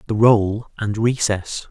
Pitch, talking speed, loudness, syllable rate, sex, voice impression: 105 Hz, 140 wpm, -19 LUFS, 3.6 syllables/s, male, masculine, adult-like, sincere, calm, kind